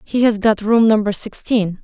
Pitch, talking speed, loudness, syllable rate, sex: 215 Hz, 195 wpm, -16 LUFS, 4.6 syllables/s, female